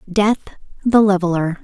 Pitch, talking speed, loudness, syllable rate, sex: 195 Hz, 110 wpm, -17 LUFS, 4.9 syllables/s, female